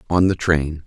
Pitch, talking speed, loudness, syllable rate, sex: 80 Hz, 210 wpm, -19 LUFS, 4.6 syllables/s, male